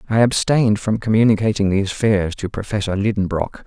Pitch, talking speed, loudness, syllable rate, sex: 105 Hz, 145 wpm, -18 LUFS, 5.8 syllables/s, male